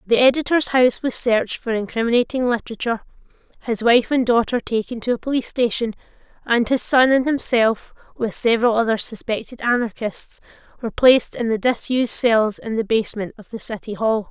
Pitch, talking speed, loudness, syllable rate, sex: 235 Hz, 170 wpm, -19 LUFS, 5.8 syllables/s, female